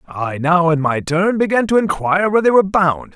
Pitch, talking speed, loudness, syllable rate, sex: 175 Hz, 230 wpm, -15 LUFS, 5.7 syllables/s, male